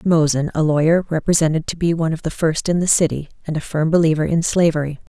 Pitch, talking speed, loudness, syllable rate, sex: 160 Hz, 220 wpm, -18 LUFS, 6.4 syllables/s, female